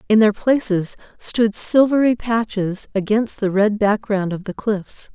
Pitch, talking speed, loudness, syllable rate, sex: 210 Hz, 150 wpm, -19 LUFS, 4.1 syllables/s, female